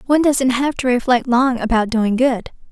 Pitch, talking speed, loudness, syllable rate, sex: 250 Hz, 200 wpm, -17 LUFS, 5.0 syllables/s, female